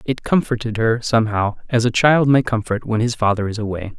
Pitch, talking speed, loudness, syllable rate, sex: 115 Hz, 210 wpm, -18 LUFS, 5.6 syllables/s, male